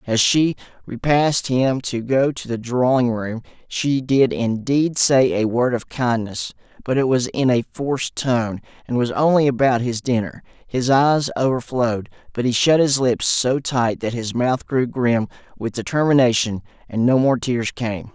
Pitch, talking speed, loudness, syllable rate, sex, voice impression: 125 Hz, 180 wpm, -19 LUFS, 4.4 syllables/s, male, very masculine, slightly young, adult-like, slightly thick, tensed, powerful, very bright, hard, very clear, slightly halting, cool, intellectual, very refreshing, sincere, calm, very friendly, very reassuring, slightly unique, slightly elegant, wild, sweet, very lively, kind, slightly strict, slightly modest